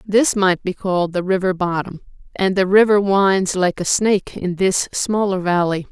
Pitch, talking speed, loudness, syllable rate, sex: 190 Hz, 185 wpm, -18 LUFS, 4.6 syllables/s, female